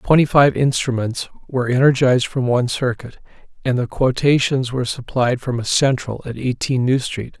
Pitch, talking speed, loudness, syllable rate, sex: 125 Hz, 160 wpm, -18 LUFS, 5.3 syllables/s, male